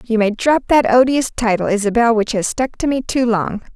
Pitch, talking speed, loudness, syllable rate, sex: 235 Hz, 225 wpm, -16 LUFS, 5.2 syllables/s, female